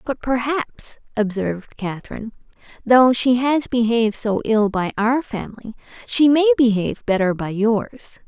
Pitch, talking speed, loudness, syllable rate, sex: 230 Hz, 140 wpm, -19 LUFS, 4.6 syllables/s, female